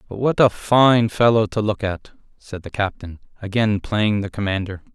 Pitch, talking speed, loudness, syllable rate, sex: 105 Hz, 180 wpm, -19 LUFS, 4.7 syllables/s, male